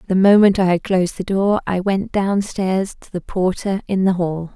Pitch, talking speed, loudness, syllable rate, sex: 190 Hz, 210 wpm, -18 LUFS, 4.8 syllables/s, female